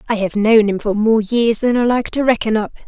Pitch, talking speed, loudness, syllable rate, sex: 220 Hz, 270 wpm, -16 LUFS, 5.5 syllables/s, female